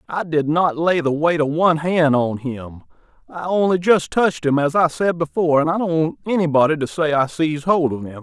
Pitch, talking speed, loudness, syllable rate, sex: 155 Hz, 235 wpm, -18 LUFS, 5.6 syllables/s, male